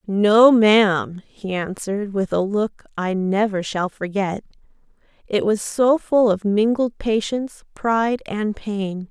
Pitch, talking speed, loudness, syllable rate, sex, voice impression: 210 Hz, 140 wpm, -20 LUFS, 3.8 syllables/s, female, feminine, slightly adult-like, slightly intellectual, slightly calm, slightly sweet